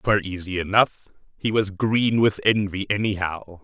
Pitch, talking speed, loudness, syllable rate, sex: 100 Hz, 150 wpm, -22 LUFS, 4.6 syllables/s, male